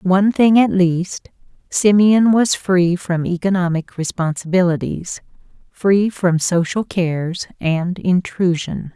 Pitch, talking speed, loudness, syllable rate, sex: 180 Hz, 105 wpm, -17 LUFS, 3.8 syllables/s, female